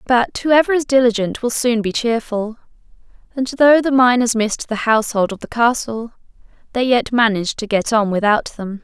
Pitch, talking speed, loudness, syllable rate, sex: 235 Hz, 175 wpm, -17 LUFS, 5.2 syllables/s, female